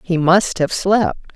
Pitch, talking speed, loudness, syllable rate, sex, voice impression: 180 Hz, 175 wpm, -16 LUFS, 3.2 syllables/s, female, feminine, middle-aged, tensed, powerful, bright, clear, fluent, intellectual, calm, friendly, reassuring, lively